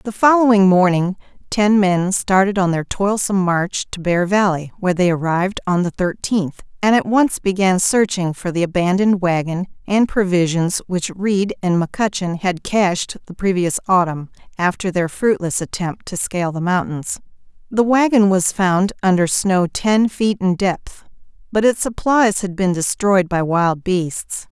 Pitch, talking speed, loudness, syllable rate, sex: 190 Hz, 160 wpm, -17 LUFS, 4.6 syllables/s, female